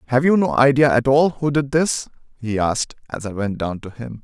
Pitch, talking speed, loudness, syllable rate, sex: 130 Hz, 240 wpm, -19 LUFS, 5.4 syllables/s, male